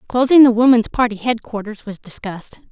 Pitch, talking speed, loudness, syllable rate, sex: 230 Hz, 155 wpm, -14 LUFS, 5.7 syllables/s, female